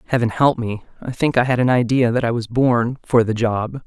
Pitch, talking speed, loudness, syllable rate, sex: 120 Hz, 250 wpm, -18 LUFS, 5.3 syllables/s, female